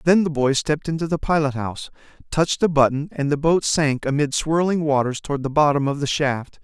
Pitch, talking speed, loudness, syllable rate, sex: 145 Hz, 215 wpm, -20 LUFS, 5.8 syllables/s, male